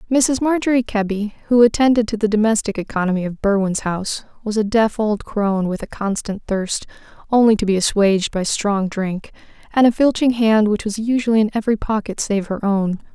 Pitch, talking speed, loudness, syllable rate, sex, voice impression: 215 Hz, 185 wpm, -18 LUFS, 5.6 syllables/s, female, feminine, slightly adult-like, slightly soft, slightly cute, slightly intellectual, slightly calm, friendly, kind